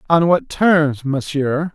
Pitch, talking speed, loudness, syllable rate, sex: 155 Hz, 140 wpm, -17 LUFS, 3.2 syllables/s, male